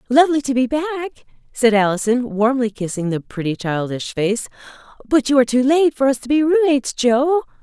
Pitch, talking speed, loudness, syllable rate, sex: 255 Hz, 180 wpm, -18 LUFS, 5.6 syllables/s, female